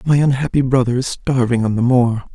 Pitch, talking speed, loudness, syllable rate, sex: 125 Hz, 205 wpm, -16 LUFS, 5.6 syllables/s, male